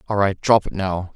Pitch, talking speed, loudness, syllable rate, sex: 100 Hz, 260 wpm, -20 LUFS, 5.0 syllables/s, male